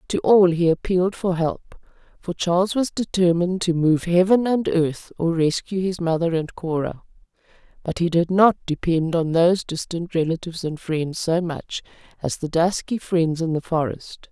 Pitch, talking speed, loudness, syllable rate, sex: 175 Hz, 170 wpm, -21 LUFS, 4.7 syllables/s, female